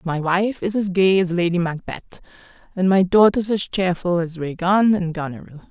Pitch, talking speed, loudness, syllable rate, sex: 180 Hz, 180 wpm, -19 LUFS, 4.9 syllables/s, female